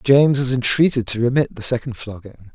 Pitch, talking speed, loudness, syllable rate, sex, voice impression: 125 Hz, 190 wpm, -17 LUFS, 5.6 syllables/s, male, masculine, adult-like, slightly relaxed, bright, slightly muffled, slightly refreshing, calm, slightly friendly, kind, modest